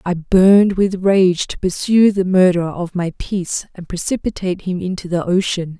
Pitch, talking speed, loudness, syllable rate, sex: 185 Hz, 175 wpm, -16 LUFS, 5.0 syllables/s, female